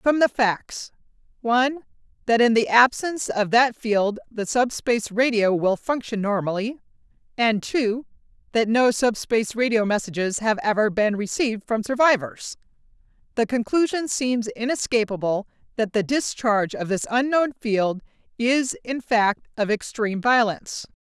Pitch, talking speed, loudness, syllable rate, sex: 230 Hz, 135 wpm, -22 LUFS, 4.7 syllables/s, female